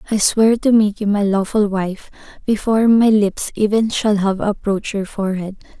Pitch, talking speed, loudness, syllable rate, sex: 205 Hz, 175 wpm, -17 LUFS, 5.0 syllables/s, female